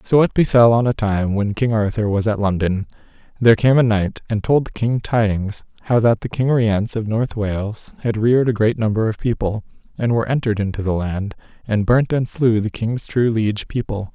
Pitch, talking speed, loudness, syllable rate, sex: 110 Hz, 215 wpm, -18 LUFS, 5.3 syllables/s, male